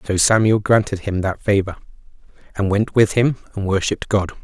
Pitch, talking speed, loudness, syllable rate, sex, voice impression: 100 Hz, 175 wpm, -18 LUFS, 5.3 syllables/s, male, masculine, middle-aged, tensed, slightly powerful, clear, slightly halting, slightly raspy, intellectual, slightly calm, friendly, unique, lively, slightly kind